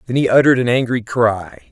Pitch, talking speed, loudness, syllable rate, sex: 115 Hz, 210 wpm, -15 LUFS, 6.2 syllables/s, male